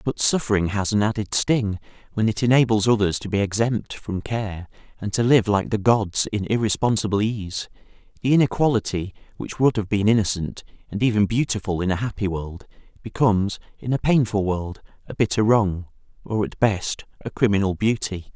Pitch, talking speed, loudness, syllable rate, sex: 105 Hz, 170 wpm, -22 LUFS, 5.2 syllables/s, male